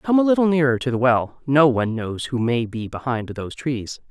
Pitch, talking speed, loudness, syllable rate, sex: 130 Hz, 235 wpm, -21 LUFS, 5.4 syllables/s, female